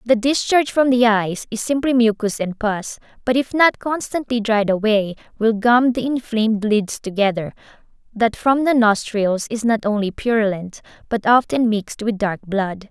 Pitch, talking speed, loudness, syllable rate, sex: 225 Hz, 165 wpm, -19 LUFS, 4.7 syllables/s, female